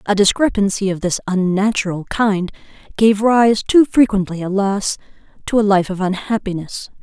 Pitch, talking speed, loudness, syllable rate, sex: 200 Hz, 135 wpm, -16 LUFS, 4.8 syllables/s, female